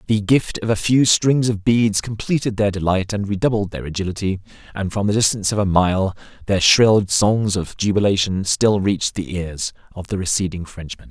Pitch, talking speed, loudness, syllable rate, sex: 100 Hz, 190 wpm, -19 LUFS, 5.2 syllables/s, male